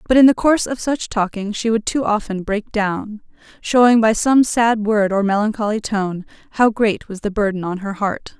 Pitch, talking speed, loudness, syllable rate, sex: 215 Hz, 205 wpm, -18 LUFS, 4.9 syllables/s, female